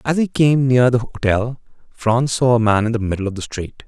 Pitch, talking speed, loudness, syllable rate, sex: 120 Hz, 250 wpm, -17 LUFS, 5.2 syllables/s, male